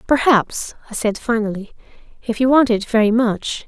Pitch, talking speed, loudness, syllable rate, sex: 230 Hz, 165 wpm, -18 LUFS, 4.9 syllables/s, female